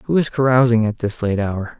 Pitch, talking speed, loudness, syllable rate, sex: 115 Hz, 235 wpm, -18 LUFS, 5.1 syllables/s, male